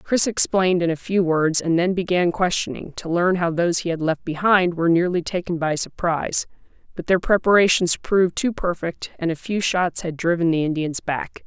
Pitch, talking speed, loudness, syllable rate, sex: 175 Hz, 200 wpm, -21 LUFS, 5.3 syllables/s, female